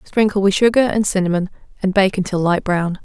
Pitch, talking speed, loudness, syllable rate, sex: 195 Hz, 195 wpm, -17 LUFS, 5.7 syllables/s, female